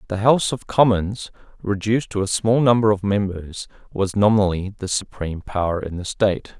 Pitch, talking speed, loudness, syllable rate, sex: 100 Hz, 175 wpm, -20 LUFS, 5.5 syllables/s, male